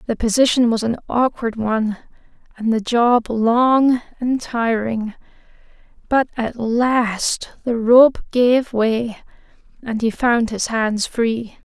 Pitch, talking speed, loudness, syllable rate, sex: 235 Hz, 130 wpm, -18 LUFS, 3.4 syllables/s, female